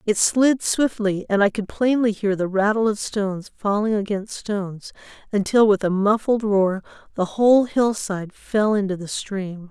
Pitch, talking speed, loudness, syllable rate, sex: 205 Hz, 165 wpm, -21 LUFS, 4.6 syllables/s, female